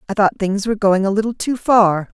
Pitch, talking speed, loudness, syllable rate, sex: 205 Hz, 245 wpm, -17 LUFS, 5.8 syllables/s, female